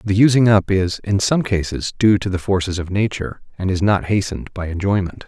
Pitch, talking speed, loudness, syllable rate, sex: 100 Hz, 215 wpm, -18 LUFS, 5.7 syllables/s, male